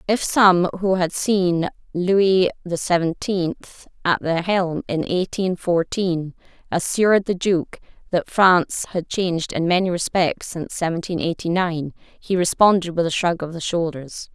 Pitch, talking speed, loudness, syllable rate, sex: 175 Hz, 150 wpm, -20 LUFS, 4.2 syllables/s, female